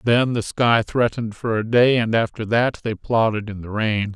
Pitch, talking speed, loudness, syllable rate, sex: 115 Hz, 215 wpm, -20 LUFS, 4.7 syllables/s, male